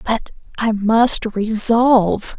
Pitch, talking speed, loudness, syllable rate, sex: 225 Hz, 100 wpm, -16 LUFS, 3.0 syllables/s, female